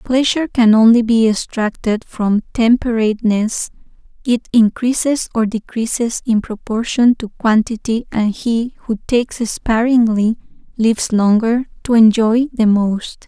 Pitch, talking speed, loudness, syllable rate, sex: 230 Hz, 120 wpm, -15 LUFS, 4.1 syllables/s, female